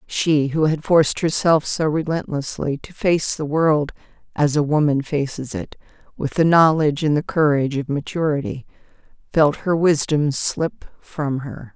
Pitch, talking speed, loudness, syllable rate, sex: 150 Hz, 155 wpm, -19 LUFS, 4.5 syllables/s, female